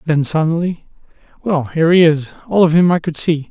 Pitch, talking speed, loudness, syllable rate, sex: 165 Hz, 190 wpm, -15 LUFS, 5.7 syllables/s, male